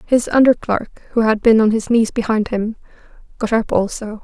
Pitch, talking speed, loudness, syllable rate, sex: 220 Hz, 200 wpm, -17 LUFS, 5.2 syllables/s, female